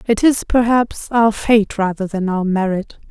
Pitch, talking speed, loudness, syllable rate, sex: 210 Hz, 175 wpm, -17 LUFS, 4.2 syllables/s, female